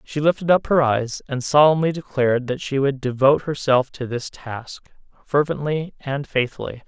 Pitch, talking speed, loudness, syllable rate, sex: 140 Hz, 165 wpm, -20 LUFS, 4.9 syllables/s, male